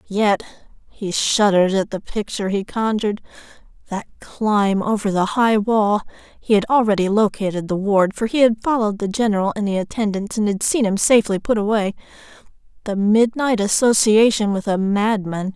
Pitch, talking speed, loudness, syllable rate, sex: 210 Hz, 155 wpm, -18 LUFS, 2.7 syllables/s, female